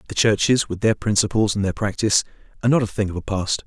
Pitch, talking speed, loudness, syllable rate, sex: 105 Hz, 245 wpm, -20 LUFS, 6.8 syllables/s, male